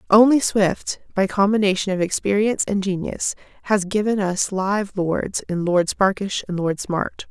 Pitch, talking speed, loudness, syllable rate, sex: 195 Hz, 155 wpm, -21 LUFS, 4.4 syllables/s, female